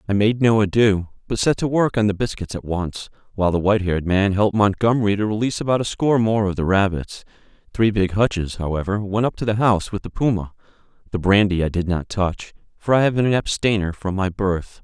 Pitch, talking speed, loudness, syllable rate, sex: 100 Hz, 225 wpm, -20 LUFS, 6.0 syllables/s, male